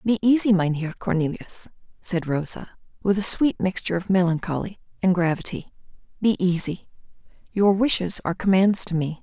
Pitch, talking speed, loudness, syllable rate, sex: 185 Hz, 145 wpm, -22 LUFS, 5.4 syllables/s, female